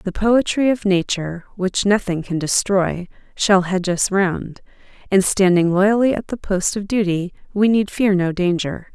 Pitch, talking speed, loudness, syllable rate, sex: 195 Hz, 170 wpm, -18 LUFS, 4.5 syllables/s, female